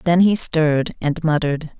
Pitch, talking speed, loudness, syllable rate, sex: 160 Hz, 165 wpm, -18 LUFS, 5.1 syllables/s, female